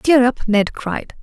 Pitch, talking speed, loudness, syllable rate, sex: 240 Hz, 195 wpm, -18 LUFS, 3.8 syllables/s, female